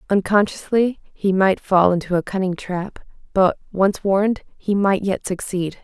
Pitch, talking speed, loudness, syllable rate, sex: 195 Hz, 135 wpm, -20 LUFS, 4.4 syllables/s, female